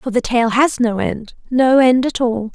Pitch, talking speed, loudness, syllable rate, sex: 240 Hz, 235 wpm, -16 LUFS, 4.2 syllables/s, female